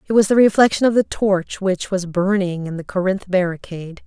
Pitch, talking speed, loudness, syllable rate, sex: 190 Hz, 205 wpm, -18 LUFS, 5.6 syllables/s, female